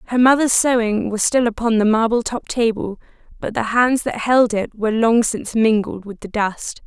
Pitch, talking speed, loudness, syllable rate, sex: 225 Hz, 200 wpm, -18 LUFS, 5.1 syllables/s, female